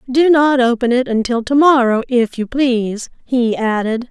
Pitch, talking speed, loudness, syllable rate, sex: 250 Hz, 175 wpm, -15 LUFS, 4.5 syllables/s, female